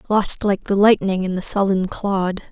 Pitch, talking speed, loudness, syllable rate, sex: 195 Hz, 190 wpm, -18 LUFS, 4.4 syllables/s, female